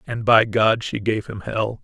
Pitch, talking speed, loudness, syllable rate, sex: 110 Hz, 230 wpm, -20 LUFS, 4.2 syllables/s, male